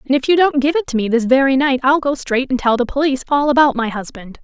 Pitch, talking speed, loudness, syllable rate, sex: 265 Hz, 295 wpm, -16 LUFS, 6.4 syllables/s, female